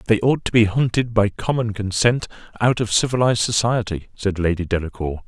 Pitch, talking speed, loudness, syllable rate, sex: 110 Hz, 170 wpm, -20 LUFS, 5.6 syllables/s, male